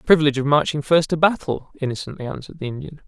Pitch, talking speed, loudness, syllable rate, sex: 145 Hz, 215 wpm, -21 LUFS, 7.6 syllables/s, male